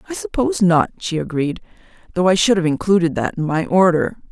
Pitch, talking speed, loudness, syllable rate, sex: 180 Hz, 195 wpm, -18 LUFS, 5.8 syllables/s, female